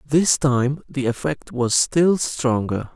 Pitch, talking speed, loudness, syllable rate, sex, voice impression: 135 Hz, 140 wpm, -20 LUFS, 3.2 syllables/s, male, masculine, adult-like, cool, sweet